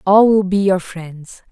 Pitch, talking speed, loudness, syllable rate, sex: 190 Hz, 200 wpm, -14 LUFS, 3.8 syllables/s, female